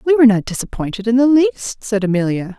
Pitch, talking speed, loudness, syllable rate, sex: 225 Hz, 210 wpm, -16 LUFS, 6.0 syllables/s, female